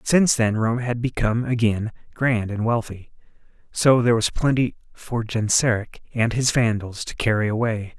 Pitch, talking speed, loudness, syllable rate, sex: 115 Hz, 165 wpm, -21 LUFS, 5.1 syllables/s, male